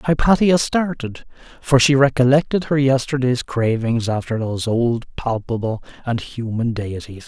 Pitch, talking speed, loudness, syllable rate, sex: 125 Hz, 125 wpm, -19 LUFS, 4.6 syllables/s, male